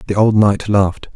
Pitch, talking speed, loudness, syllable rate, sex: 100 Hz, 210 wpm, -14 LUFS, 5.3 syllables/s, male